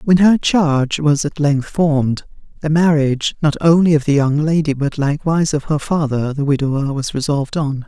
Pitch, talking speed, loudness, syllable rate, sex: 150 Hz, 190 wpm, -16 LUFS, 5.3 syllables/s, female